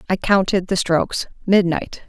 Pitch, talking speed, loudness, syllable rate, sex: 185 Hz, 115 wpm, -19 LUFS, 4.8 syllables/s, female